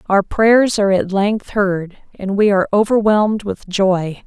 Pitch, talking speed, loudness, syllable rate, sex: 200 Hz, 170 wpm, -16 LUFS, 4.3 syllables/s, female